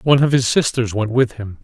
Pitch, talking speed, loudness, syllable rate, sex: 120 Hz, 255 wpm, -17 LUFS, 5.9 syllables/s, male